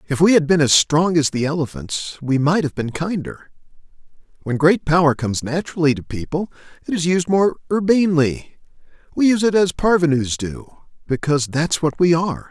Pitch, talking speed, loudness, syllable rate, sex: 160 Hz, 175 wpm, -18 LUFS, 5.5 syllables/s, male